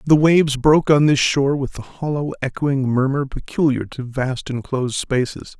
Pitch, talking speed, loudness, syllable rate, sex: 135 Hz, 170 wpm, -19 LUFS, 5.1 syllables/s, male